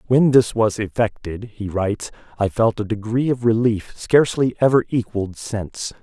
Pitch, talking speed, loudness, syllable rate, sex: 110 Hz, 160 wpm, -20 LUFS, 5.1 syllables/s, male